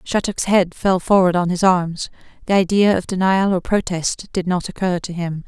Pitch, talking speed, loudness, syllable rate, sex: 185 Hz, 185 wpm, -18 LUFS, 4.9 syllables/s, female